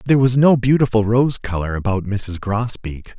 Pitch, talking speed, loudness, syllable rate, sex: 110 Hz, 170 wpm, -18 LUFS, 5.0 syllables/s, male